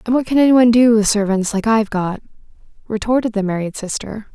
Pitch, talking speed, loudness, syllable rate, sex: 220 Hz, 205 wpm, -16 LUFS, 6.5 syllables/s, female